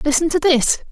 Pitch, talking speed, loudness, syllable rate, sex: 305 Hz, 195 wpm, -16 LUFS, 5.1 syllables/s, female